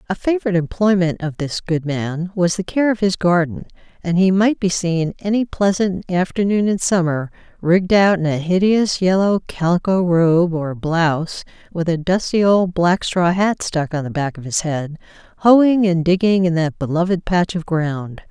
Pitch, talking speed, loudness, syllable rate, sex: 180 Hz, 185 wpm, -18 LUFS, 4.6 syllables/s, female